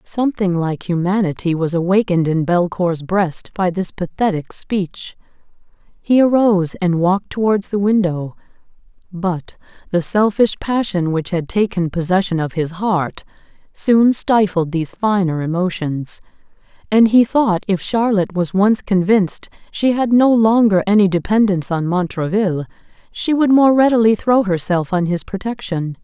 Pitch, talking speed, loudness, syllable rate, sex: 190 Hz, 140 wpm, -17 LUFS, 4.7 syllables/s, female